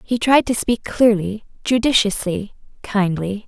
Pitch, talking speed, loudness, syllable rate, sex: 215 Hz, 120 wpm, -18 LUFS, 4.2 syllables/s, female